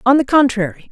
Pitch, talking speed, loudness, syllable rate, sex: 260 Hz, 195 wpm, -14 LUFS, 6.3 syllables/s, female